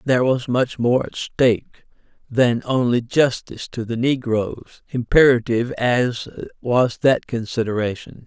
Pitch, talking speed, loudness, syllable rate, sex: 120 Hz, 125 wpm, -20 LUFS, 4.4 syllables/s, male